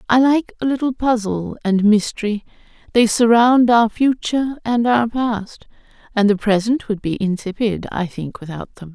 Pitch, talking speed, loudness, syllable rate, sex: 225 Hz, 155 wpm, -18 LUFS, 4.6 syllables/s, female